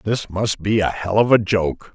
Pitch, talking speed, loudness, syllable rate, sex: 100 Hz, 245 wpm, -19 LUFS, 4.2 syllables/s, male